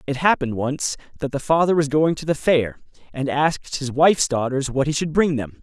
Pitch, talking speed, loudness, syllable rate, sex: 140 Hz, 225 wpm, -21 LUFS, 5.5 syllables/s, male